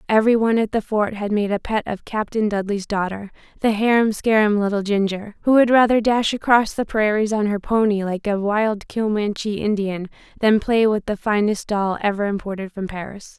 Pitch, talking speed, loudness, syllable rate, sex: 210 Hz, 185 wpm, -20 LUFS, 5.2 syllables/s, female